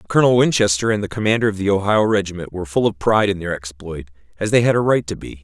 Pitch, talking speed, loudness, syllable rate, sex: 100 Hz, 265 wpm, -18 LUFS, 7.3 syllables/s, male